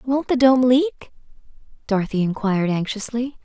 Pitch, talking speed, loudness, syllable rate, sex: 230 Hz, 120 wpm, -20 LUFS, 4.9 syllables/s, female